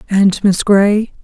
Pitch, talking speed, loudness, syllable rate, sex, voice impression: 200 Hz, 145 wpm, -12 LUFS, 3.1 syllables/s, female, feminine, slightly young, relaxed, slightly dark, soft, muffled, halting, slightly cute, reassuring, elegant, slightly sweet, kind, modest